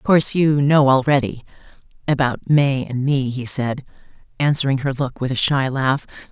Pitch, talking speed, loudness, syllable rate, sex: 135 Hz, 160 wpm, -18 LUFS, 4.9 syllables/s, female